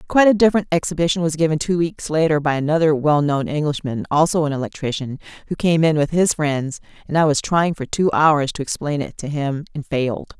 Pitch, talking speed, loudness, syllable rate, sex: 155 Hz, 210 wpm, -19 LUFS, 5.9 syllables/s, female